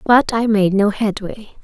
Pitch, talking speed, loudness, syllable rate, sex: 210 Hz, 185 wpm, -16 LUFS, 4.3 syllables/s, female